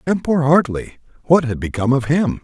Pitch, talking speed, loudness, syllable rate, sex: 140 Hz, 170 wpm, -17 LUFS, 5.5 syllables/s, male